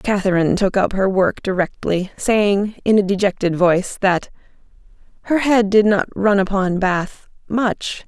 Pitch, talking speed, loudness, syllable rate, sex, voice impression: 200 Hz, 140 wpm, -18 LUFS, 4.3 syllables/s, female, feminine, slightly adult-like, slightly soft, sincere, slightly sweet, slightly kind